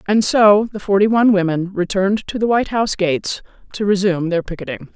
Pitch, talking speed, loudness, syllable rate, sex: 195 Hz, 195 wpm, -17 LUFS, 6.4 syllables/s, female